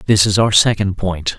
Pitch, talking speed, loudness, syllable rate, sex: 100 Hz, 215 wpm, -14 LUFS, 4.9 syllables/s, male